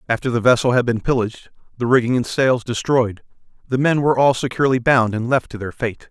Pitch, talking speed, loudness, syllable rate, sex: 125 Hz, 215 wpm, -18 LUFS, 6.2 syllables/s, male